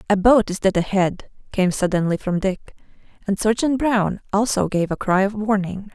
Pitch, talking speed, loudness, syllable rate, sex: 200 Hz, 180 wpm, -20 LUFS, 5.1 syllables/s, female